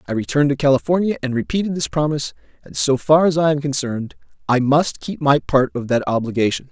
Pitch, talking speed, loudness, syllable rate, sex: 140 Hz, 205 wpm, -18 LUFS, 6.3 syllables/s, male